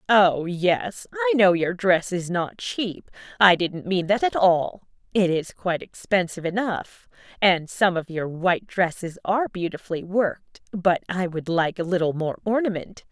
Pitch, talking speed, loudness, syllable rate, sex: 185 Hz, 170 wpm, -23 LUFS, 4.5 syllables/s, female